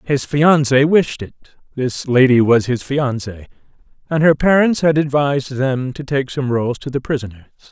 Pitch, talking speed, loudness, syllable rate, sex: 135 Hz, 170 wpm, -16 LUFS, 4.2 syllables/s, male